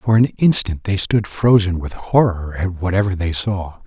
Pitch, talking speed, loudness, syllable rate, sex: 95 Hz, 185 wpm, -18 LUFS, 4.5 syllables/s, male